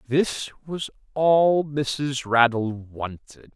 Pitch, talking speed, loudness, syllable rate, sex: 135 Hz, 100 wpm, -23 LUFS, 2.8 syllables/s, male